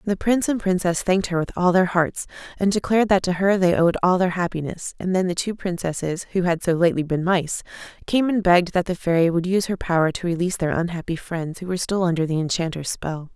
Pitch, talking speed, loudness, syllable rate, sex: 180 Hz, 240 wpm, -21 LUFS, 6.1 syllables/s, female